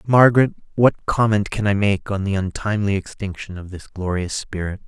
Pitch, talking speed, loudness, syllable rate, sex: 100 Hz, 170 wpm, -20 LUFS, 5.3 syllables/s, male